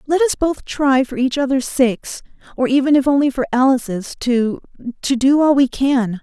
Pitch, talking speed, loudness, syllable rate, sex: 265 Hz, 185 wpm, -17 LUFS, 5.0 syllables/s, female